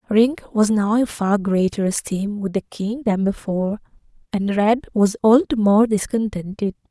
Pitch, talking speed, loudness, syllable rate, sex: 210 Hz, 165 wpm, -20 LUFS, 4.6 syllables/s, female